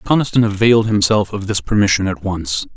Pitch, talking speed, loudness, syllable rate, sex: 100 Hz, 175 wpm, -16 LUFS, 5.7 syllables/s, male